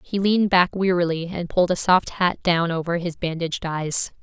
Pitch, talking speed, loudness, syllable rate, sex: 175 Hz, 200 wpm, -21 LUFS, 5.2 syllables/s, female